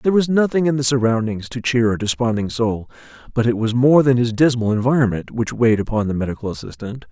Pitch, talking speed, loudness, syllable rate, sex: 120 Hz, 210 wpm, -18 LUFS, 6.2 syllables/s, male